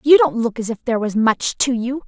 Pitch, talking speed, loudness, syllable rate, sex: 240 Hz, 290 wpm, -18 LUFS, 5.6 syllables/s, female